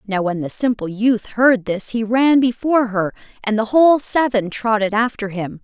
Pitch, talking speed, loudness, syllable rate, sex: 225 Hz, 190 wpm, -17 LUFS, 4.8 syllables/s, female